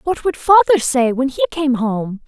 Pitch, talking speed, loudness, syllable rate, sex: 250 Hz, 210 wpm, -16 LUFS, 4.8 syllables/s, female